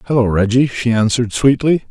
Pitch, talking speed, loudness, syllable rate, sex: 120 Hz, 155 wpm, -15 LUFS, 6.1 syllables/s, male